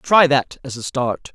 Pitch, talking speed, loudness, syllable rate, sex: 135 Hz, 225 wpm, -18 LUFS, 3.9 syllables/s, female